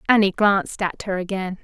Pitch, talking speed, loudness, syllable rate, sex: 195 Hz, 185 wpm, -21 LUFS, 5.6 syllables/s, female